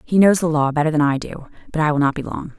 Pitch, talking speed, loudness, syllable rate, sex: 155 Hz, 325 wpm, -19 LUFS, 6.7 syllables/s, female